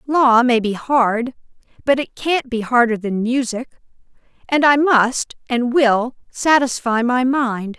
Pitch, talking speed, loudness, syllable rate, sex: 250 Hz, 145 wpm, -17 LUFS, 3.8 syllables/s, female